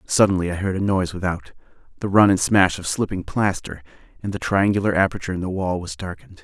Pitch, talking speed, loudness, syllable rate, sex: 95 Hz, 205 wpm, -21 LUFS, 6.4 syllables/s, male